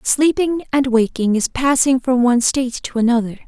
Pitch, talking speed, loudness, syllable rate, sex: 250 Hz, 175 wpm, -17 LUFS, 5.2 syllables/s, female